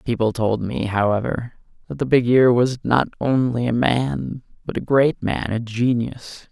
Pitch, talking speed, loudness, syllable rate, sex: 115 Hz, 185 wpm, -20 LUFS, 4.4 syllables/s, male